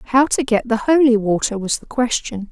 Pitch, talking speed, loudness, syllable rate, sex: 235 Hz, 215 wpm, -17 LUFS, 4.9 syllables/s, female